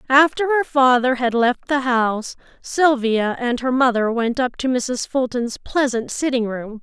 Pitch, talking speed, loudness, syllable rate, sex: 250 Hz, 165 wpm, -19 LUFS, 4.3 syllables/s, female